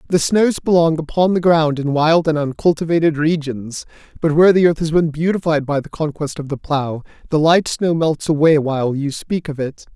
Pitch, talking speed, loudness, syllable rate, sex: 155 Hz, 205 wpm, -17 LUFS, 5.2 syllables/s, male